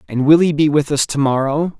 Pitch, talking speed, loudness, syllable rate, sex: 140 Hz, 265 wpm, -15 LUFS, 5.6 syllables/s, male